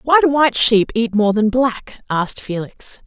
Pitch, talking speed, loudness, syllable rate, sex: 230 Hz, 195 wpm, -16 LUFS, 4.5 syllables/s, female